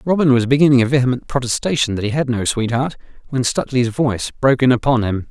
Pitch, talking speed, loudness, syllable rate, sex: 125 Hz, 205 wpm, -17 LUFS, 6.6 syllables/s, male